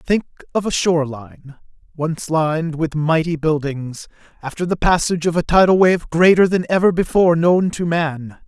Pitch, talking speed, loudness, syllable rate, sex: 165 Hz, 165 wpm, -17 LUFS, 5.0 syllables/s, male